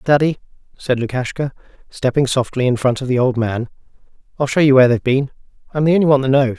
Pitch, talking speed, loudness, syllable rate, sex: 130 Hz, 200 wpm, -17 LUFS, 6.8 syllables/s, male